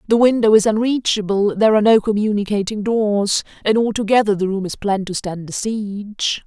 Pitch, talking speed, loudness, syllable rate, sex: 210 Hz, 175 wpm, -17 LUFS, 5.6 syllables/s, female